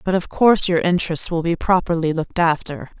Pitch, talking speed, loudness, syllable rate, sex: 170 Hz, 200 wpm, -18 LUFS, 5.9 syllables/s, female